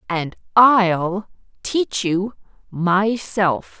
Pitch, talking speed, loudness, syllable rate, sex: 200 Hz, 65 wpm, -19 LUFS, 2.2 syllables/s, female